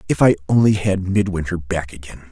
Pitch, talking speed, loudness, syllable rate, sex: 90 Hz, 180 wpm, -18 LUFS, 5.7 syllables/s, male